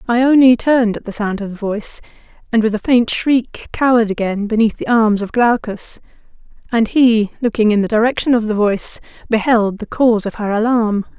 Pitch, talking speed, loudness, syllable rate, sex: 225 Hz, 190 wpm, -15 LUFS, 5.3 syllables/s, female